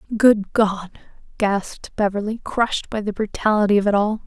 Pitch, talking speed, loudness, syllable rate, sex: 210 Hz, 155 wpm, -20 LUFS, 5.3 syllables/s, female